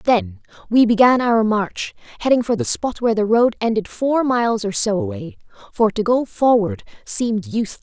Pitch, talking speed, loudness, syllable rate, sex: 235 Hz, 185 wpm, -18 LUFS, 5.2 syllables/s, female